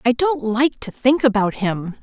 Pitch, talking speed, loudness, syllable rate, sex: 240 Hz, 205 wpm, -19 LUFS, 4.2 syllables/s, female